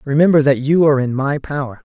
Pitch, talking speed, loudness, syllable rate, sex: 140 Hz, 220 wpm, -15 LUFS, 6.3 syllables/s, male